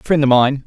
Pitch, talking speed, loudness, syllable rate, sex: 140 Hz, 270 wpm, -14 LUFS, 4.8 syllables/s, male